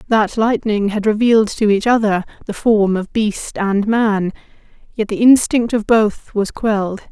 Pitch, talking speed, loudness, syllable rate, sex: 215 Hz, 170 wpm, -16 LUFS, 4.3 syllables/s, female